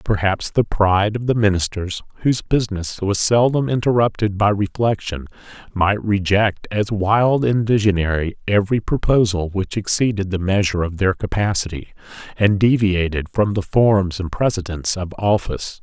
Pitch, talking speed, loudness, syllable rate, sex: 100 Hz, 140 wpm, -19 LUFS, 5.0 syllables/s, male